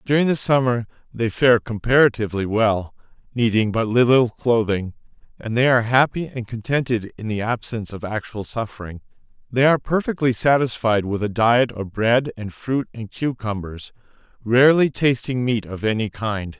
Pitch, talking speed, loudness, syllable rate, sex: 115 Hz, 150 wpm, -20 LUFS, 5.1 syllables/s, male